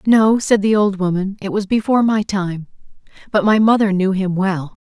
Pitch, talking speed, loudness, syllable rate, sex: 200 Hz, 200 wpm, -16 LUFS, 5.1 syllables/s, female